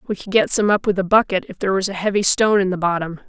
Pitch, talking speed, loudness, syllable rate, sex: 195 Hz, 310 wpm, -18 LUFS, 7.0 syllables/s, female